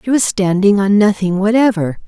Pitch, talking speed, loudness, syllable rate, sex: 200 Hz, 175 wpm, -13 LUFS, 5.2 syllables/s, female